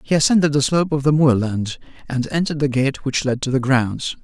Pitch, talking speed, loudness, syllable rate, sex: 140 Hz, 225 wpm, -19 LUFS, 5.8 syllables/s, male